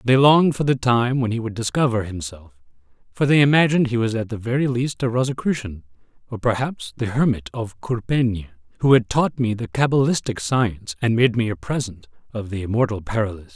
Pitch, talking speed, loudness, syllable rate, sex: 115 Hz, 190 wpm, -21 LUFS, 5.8 syllables/s, male